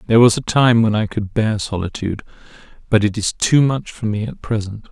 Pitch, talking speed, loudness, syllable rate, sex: 110 Hz, 220 wpm, -18 LUFS, 5.7 syllables/s, male